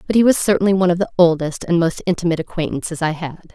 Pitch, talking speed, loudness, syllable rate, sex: 170 Hz, 235 wpm, -18 LUFS, 7.3 syllables/s, female